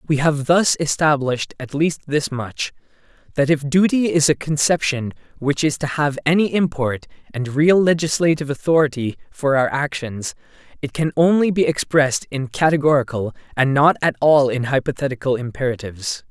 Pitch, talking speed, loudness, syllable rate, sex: 145 Hz, 150 wpm, -19 LUFS, 5.2 syllables/s, male